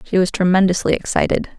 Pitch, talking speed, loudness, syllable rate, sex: 185 Hz, 150 wpm, -17 LUFS, 6.3 syllables/s, female